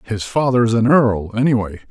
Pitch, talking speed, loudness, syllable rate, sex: 115 Hz, 190 wpm, -16 LUFS, 5.6 syllables/s, male